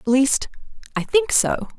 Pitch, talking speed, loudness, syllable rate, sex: 285 Hz, 170 wpm, -20 LUFS, 4.1 syllables/s, female